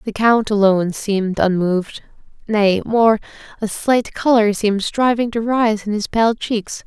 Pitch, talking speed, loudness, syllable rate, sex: 215 Hz, 150 wpm, -17 LUFS, 4.5 syllables/s, female